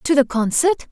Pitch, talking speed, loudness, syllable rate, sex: 280 Hz, 195 wpm, -18 LUFS, 5.6 syllables/s, female